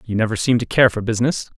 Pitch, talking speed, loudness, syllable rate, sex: 115 Hz, 265 wpm, -18 LUFS, 7.8 syllables/s, male